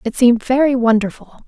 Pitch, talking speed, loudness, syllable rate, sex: 235 Hz, 160 wpm, -15 LUFS, 6.1 syllables/s, female